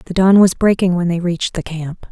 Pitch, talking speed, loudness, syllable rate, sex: 180 Hz, 255 wpm, -15 LUFS, 5.7 syllables/s, female